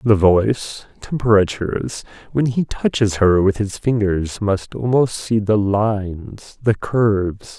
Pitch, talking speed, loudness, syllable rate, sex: 105 Hz, 135 wpm, -18 LUFS, 3.9 syllables/s, male